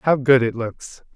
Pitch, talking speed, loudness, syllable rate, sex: 125 Hz, 210 wpm, -19 LUFS, 4.3 syllables/s, male